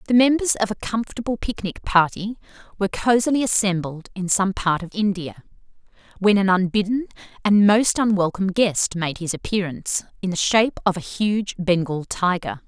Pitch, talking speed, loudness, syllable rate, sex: 195 Hz, 160 wpm, -21 LUFS, 5.3 syllables/s, female